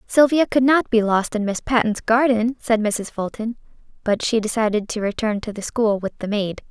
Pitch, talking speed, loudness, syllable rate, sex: 225 Hz, 205 wpm, -20 LUFS, 5.0 syllables/s, female